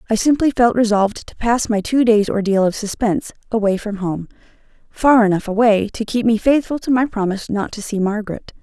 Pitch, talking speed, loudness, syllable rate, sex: 220 Hz, 195 wpm, -17 LUFS, 5.7 syllables/s, female